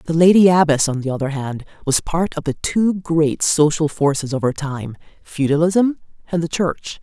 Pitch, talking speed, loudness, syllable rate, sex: 155 Hz, 190 wpm, -18 LUFS, 4.7 syllables/s, female